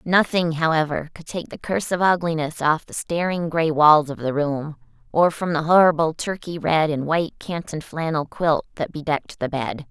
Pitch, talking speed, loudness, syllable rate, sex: 160 Hz, 190 wpm, -21 LUFS, 5.0 syllables/s, female